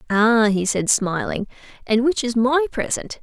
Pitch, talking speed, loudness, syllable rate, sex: 230 Hz, 165 wpm, -19 LUFS, 4.3 syllables/s, female